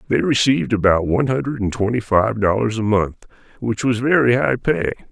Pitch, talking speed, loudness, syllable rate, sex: 115 Hz, 190 wpm, -18 LUFS, 5.7 syllables/s, male